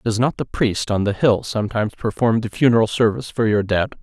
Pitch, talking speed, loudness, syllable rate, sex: 110 Hz, 225 wpm, -19 LUFS, 6.0 syllables/s, male